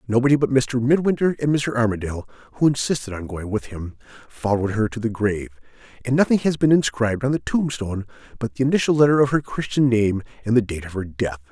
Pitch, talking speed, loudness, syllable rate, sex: 120 Hz, 210 wpm, -21 LUFS, 5.9 syllables/s, male